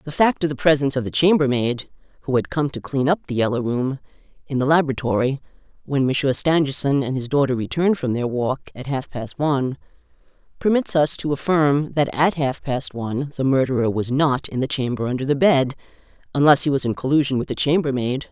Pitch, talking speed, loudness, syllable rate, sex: 140 Hz, 195 wpm, -21 LUFS, 5.9 syllables/s, female